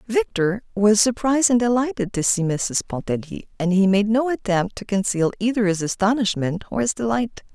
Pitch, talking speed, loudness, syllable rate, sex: 210 Hz, 175 wpm, -21 LUFS, 5.2 syllables/s, female